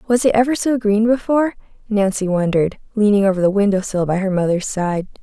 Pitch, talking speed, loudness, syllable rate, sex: 205 Hz, 195 wpm, -17 LUFS, 6.1 syllables/s, female